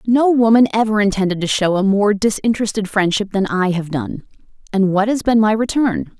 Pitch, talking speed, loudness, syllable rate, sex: 210 Hz, 195 wpm, -16 LUFS, 5.4 syllables/s, female